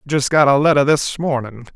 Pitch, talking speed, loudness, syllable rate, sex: 140 Hz, 205 wpm, -16 LUFS, 5.2 syllables/s, male